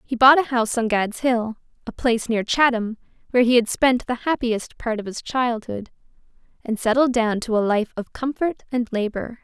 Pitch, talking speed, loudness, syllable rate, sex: 235 Hz, 185 wpm, -21 LUFS, 5.1 syllables/s, female